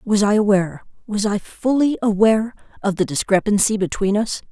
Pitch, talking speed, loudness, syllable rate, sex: 205 Hz, 145 wpm, -19 LUFS, 5.5 syllables/s, female